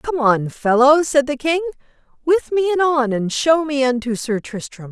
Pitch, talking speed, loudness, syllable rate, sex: 275 Hz, 185 wpm, -17 LUFS, 4.5 syllables/s, female